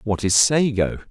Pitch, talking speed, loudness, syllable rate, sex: 110 Hz, 165 wpm, -18 LUFS, 4.4 syllables/s, male